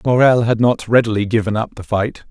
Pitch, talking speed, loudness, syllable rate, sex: 110 Hz, 235 wpm, -16 LUFS, 5.9 syllables/s, male